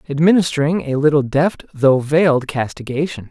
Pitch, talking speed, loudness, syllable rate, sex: 145 Hz, 125 wpm, -17 LUFS, 5.2 syllables/s, male